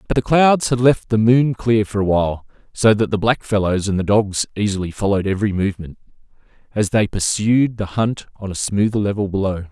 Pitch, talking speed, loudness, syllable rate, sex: 105 Hz, 200 wpm, -18 LUFS, 5.6 syllables/s, male